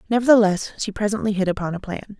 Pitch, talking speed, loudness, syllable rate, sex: 205 Hz, 190 wpm, -20 LUFS, 6.8 syllables/s, female